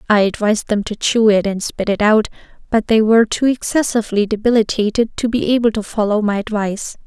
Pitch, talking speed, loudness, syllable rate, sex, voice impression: 215 Hz, 195 wpm, -16 LUFS, 5.9 syllables/s, female, very feminine, very young, very thin, tensed, slightly weak, slightly bright, soft, very clear, slightly fluent, very cute, intellectual, refreshing, sincere, calm, very friendly, reassuring, very unique, elegant, slightly wild, sweet, slightly lively, kind, slightly sharp, modest